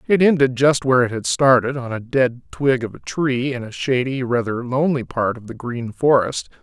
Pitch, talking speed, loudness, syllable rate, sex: 125 Hz, 215 wpm, -19 LUFS, 5.1 syllables/s, male